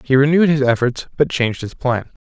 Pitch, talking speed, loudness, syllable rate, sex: 135 Hz, 215 wpm, -17 LUFS, 6.2 syllables/s, male